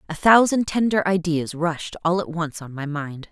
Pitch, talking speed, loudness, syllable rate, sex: 170 Hz, 200 wpm, -21 LUFS, 4.6 syllables/s, female